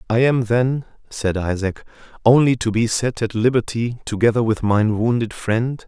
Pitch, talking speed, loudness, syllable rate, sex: 115 Hz, 165 wpm, -19 LUFS, 4.6 syllables/s, male